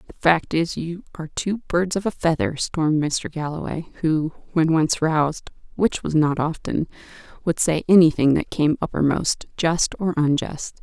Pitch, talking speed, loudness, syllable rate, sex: 160 Hz, 165 wpm, -21 LUFS, 4.6 syllables/s, female